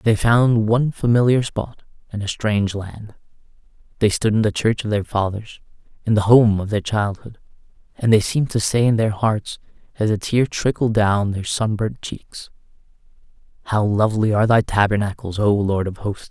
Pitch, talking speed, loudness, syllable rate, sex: 110 Hz, 180 wpm, -19 LUFS, 5.0 syllables/s, male